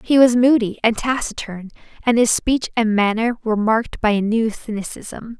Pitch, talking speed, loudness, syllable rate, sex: 225 Hz, 180 wpm, -18 LUFS, 5.0 syllables/s, female